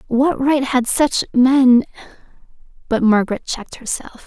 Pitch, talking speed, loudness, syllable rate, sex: 255 Hz, 115 wpm, -16 LUFS, 4.7 syllables/s, female